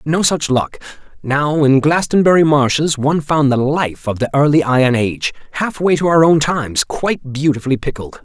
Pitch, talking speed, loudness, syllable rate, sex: 145 Hz, 165 wpm, -15 LUFS, 5.3 syllables/s, male